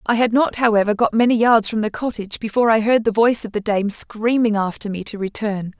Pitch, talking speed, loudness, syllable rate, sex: 220 Hz, 240 wpm, -18 LUFS, 6.0 syllables/s, female